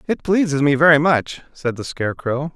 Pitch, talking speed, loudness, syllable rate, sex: 145 Hz, 190 wpm, -18 LUFS, 5.3 syllables/s, male